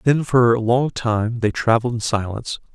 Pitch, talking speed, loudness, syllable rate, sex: 120 Hz, 195 wpm, -19 LUFS, 5.2 syllables/s, male